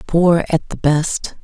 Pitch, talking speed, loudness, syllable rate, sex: 160 Hz, 165 wpm, -17 LUFS, 3.2 syllables/s, female